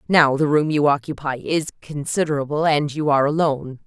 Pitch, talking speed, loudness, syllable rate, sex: 145 Hz, 170 wpm, -20 LUFS, 5.7 syllables/s, female